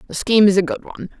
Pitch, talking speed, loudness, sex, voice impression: 205 Hz, 300 wpm, -16 LUFS, female, very feminine, young, thin, slightly tensed, slightly weak, bright, slightly soft, clear, fluent, cute, very intellectual, refreshing, sincere, calm, friendly, reassuring, slightly unique, elegant, slightly sweet, lively, kind, slightly intense, light